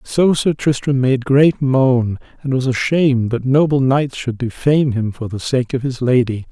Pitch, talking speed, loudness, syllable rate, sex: 130 Hz, 195 wpm, -16 LUFS, 4.6 syllables/s, male